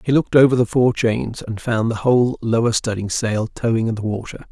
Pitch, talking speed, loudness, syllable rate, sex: 115 Hz, 225 wpm, -19 LUFS, 5.6 syllables/s, male